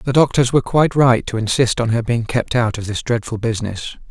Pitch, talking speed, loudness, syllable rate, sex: 120 Hz, 235 wpm, -17 LUFS, 6.0 syllables/s, male